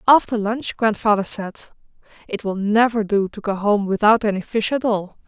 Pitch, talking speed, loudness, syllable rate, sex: 210 Hz, 180 wpm, -20 LUFS, 4.9 syllables/s, female